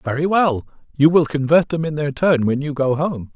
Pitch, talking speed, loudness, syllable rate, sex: 150 Hz, 235 wpm, -18 LUFS, 5.0 syllables/s, male